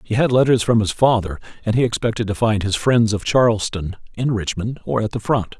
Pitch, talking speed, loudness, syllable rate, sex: 110 Hz, 225 wpm, -19 LUFS, 5.6 syllables/s, male